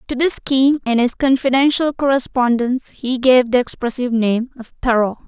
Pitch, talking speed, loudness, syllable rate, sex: 250 Hz, 160 wpm, -17 LUFS, 5.4 syllables/s, female